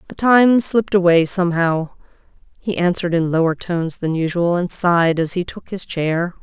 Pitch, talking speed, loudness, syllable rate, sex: 175 Hz, 175 wpm, -17 LUFS, 5.2 syllables/s, female